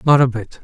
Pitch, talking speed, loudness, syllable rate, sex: 125 Hz, 285 wpm, -16 LUFS, 5.9 syllables/s, male